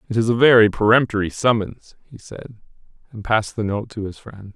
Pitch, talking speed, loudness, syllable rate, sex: 110 Hz, 200 wpm, -18 LUFS, 5.7 syllables/s, male